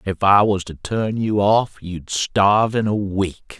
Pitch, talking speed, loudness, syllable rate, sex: 100 Hz, 200 wpm, -19 LUFS, 3.8 syllables/s, male